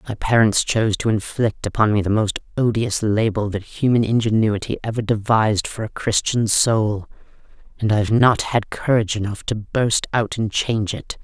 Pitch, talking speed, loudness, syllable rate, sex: 110 Hz, 170 wpm, -20 LUFS, 5.1 syllables/s, female